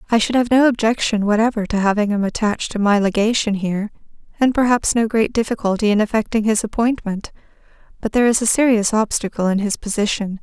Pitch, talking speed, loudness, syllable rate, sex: 220 Hz, 185 wpm, -18 LUFS, 6.2 syllables/s, female